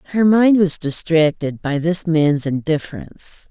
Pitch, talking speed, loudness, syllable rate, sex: 165 Hz, 135 wpm, -17 LUFS, 4.3 syllables/s, female